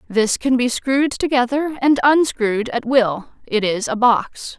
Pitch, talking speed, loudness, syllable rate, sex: 245 Hz, 170 wpm, -18 LUFS, 4.3 syllables/s, female